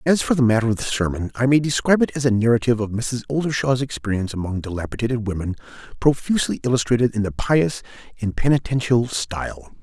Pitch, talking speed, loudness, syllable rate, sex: 120 Hz, 175 wpm, -21 LUFS, 6.5 syllables/s, male